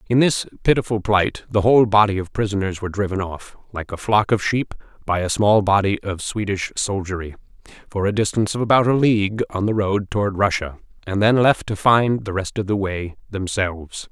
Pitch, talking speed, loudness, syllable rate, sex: 100 Hz, 200 wpm, -20 LUFS, 5.5 syllables/s, male